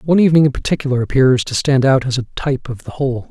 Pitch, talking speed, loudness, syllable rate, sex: 135 Hz, 255 wpm, -16 LUFS, 7.4 syllables/s, male